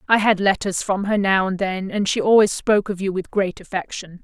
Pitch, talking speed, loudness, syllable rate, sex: 195 Hz, 240 wpm, -20 LUFS, 5.4 syllables/s, female